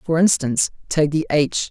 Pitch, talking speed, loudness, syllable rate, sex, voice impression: 150 Hz, 175 wpm, -19 LUFS, 5.1 syllables/s, male, masculine, slightly gender-neutral, slightly young, adult-like, slightly thick, slightly relaxed, slightly weak, bright, slightly soft, clear, fluent, cool, intellectual, refreshing, slightly sincere, calm, slightly mature, friendly, reassuring, slightly unique, elegant, slightly wild, sweet, very lively, very kind, modest, slightly light